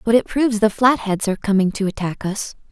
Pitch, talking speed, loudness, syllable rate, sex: 210 Hz, 220 wpm, -19 LUFS, 6.1 syllables/s, female